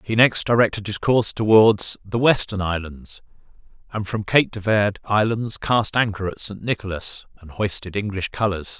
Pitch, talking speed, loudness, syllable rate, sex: 105 Hz, 165 wpm, -20 LUFS, 4.7 syllables/s, male